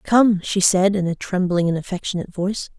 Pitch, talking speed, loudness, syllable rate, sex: 185 Hz, 195 wpm, -20 LUFS, 5.8 syllables/s, female